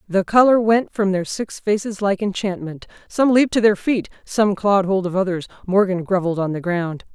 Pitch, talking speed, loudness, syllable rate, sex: 195 Hz, 200 wpm, -19 LUFS, 5.3 syllables/s, female